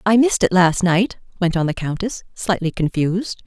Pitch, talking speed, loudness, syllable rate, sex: 190 Hz, 190 wpm, -19 LUFS, 5.3 syllables/s, female